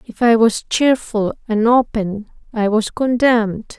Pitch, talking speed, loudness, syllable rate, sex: 225 Hz, 145 wpm, -16 LUFS, 3.9 syllables/s, female